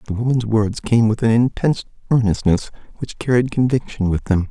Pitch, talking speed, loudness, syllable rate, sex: 115 Hz, 175 wpm, -18 LUFS, 5.5 syllables/s, male